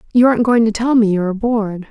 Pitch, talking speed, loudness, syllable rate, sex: 220 Hz, 285 wpm, -15 LUFS, 7.3 syllables/s, female